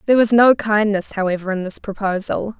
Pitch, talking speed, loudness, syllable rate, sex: 205 Hz, 185 wpm, -18 LUFS, 5.8 syllables/s, female